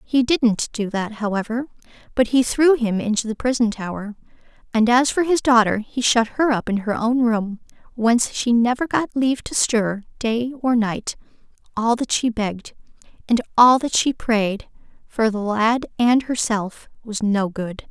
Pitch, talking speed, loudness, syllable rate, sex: 230 Hz, 180 wpm, -20 LUFS, 4.5 syllables/s, female